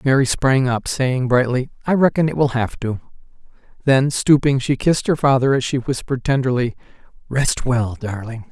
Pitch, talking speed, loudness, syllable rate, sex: 130 Hz, 170 wpm, -18 LUFS, 5.2 syllables/s, male